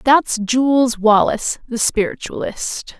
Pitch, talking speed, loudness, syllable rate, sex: 235 Hz, 100 wpm, -17 LUFS, 3.6 syllables/s, female